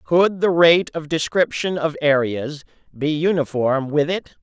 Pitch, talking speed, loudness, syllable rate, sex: 155 Hz, 150 wpm, -19 LUFS, 4.1 syllables/s, male